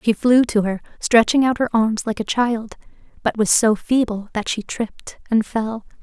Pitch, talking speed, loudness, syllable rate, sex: 225 Hz, 200 wpm, -19 LUFS, 4.6 syllables/s, female